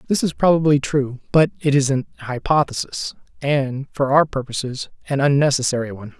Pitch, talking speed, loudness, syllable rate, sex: 140 Hz, 155 wpm, -20 LUFS, 5.5 syllables/s, male